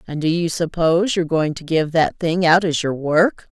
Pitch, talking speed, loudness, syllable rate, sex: 165 Hz, 235 wpm, -18 LUFS, 5.0 syllables/s, female